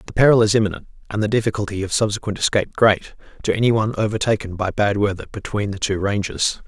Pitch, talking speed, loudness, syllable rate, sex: 105 Hz, 200 wpm, -20 LUFS, 6.9 syllables/s, male